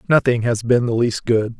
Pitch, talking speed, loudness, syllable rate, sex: 120 Hz, 225 wpm, -18 LUFS, 5.1 syllables/s, male